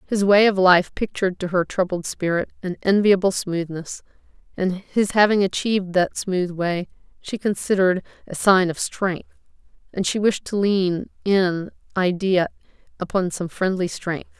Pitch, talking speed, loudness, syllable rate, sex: 185 Hz, 150 wpm, -21 LUFS, 4.6 syllables/s, female